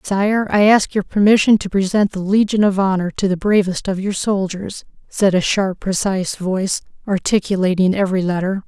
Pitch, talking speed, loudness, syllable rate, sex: 195 Hz, 175 wpm, -17 LUFS, 5.2 syllables/s, female